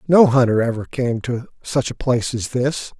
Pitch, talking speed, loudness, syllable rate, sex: 125 Hz, 200 wpm, -19 LUFS, 5.0 syllables/s, male